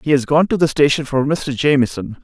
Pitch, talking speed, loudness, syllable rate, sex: 140 Hz, 240 wpm, -16 LUFS, 5.6 syllables/s, male